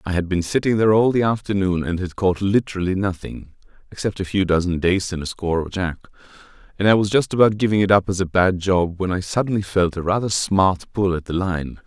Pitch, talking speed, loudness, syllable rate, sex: 95 Hz, 230 wpm, -20 LUFS, 5.9 syllables/s, male